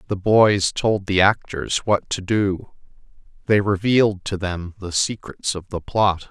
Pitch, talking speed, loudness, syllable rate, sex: 100 Hz, 160 wpm, -20 LUFS, 4.0 syllables/s, male